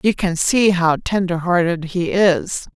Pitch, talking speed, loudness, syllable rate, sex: 180 Hz, 175 wpm, -17 LUFS, 3.9 syllables/s, female